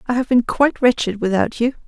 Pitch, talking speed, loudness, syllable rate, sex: 240 Hz, 225 wpm, -18 LUFS, 6.2 syllables/s, female